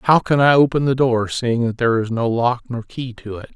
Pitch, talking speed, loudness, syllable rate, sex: 120 Hz, 270 wpm, -18 LUFS, 5.2 syllables/s, male